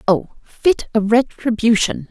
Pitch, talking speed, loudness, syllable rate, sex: 225 Hz, 85 wpm, -17 LUFS, 3.4 syllables/s, female